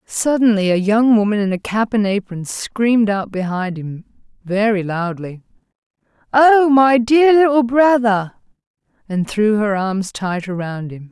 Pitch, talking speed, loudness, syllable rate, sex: 215 Hz, 145 wpm, -16 LUFS, 4.2 syllables/s, female